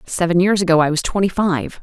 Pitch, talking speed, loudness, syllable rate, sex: 175 Hz, 230 wpm, -17 LUFS, 5.8 syllables/s, female